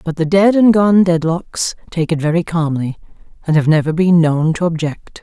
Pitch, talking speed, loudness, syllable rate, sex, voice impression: 165 Hz, 195 wpm, -15 LUFS, 4.9 syllables/s, female, feminine, adult-like, slightly thick, tensed, slightly powerful, hard, slightly soft, slightly muffled, intellectual, calm, reassuring, elegant, kind, slightly modest